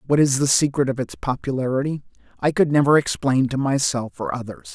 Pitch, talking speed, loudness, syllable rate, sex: 135 Hz, 190 wpm, -21 LUFS, 5.7 syllables/s, male